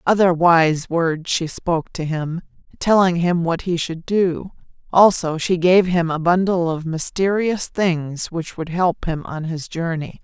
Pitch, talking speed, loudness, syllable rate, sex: 170 Hz, 170 wpm, -19 LUFS, 4.0 syllables/s, female